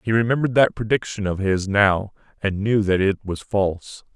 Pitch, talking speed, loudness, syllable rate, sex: 105 Hz, 190 wpm, -21 LUFS, 5.1 syllables/s, male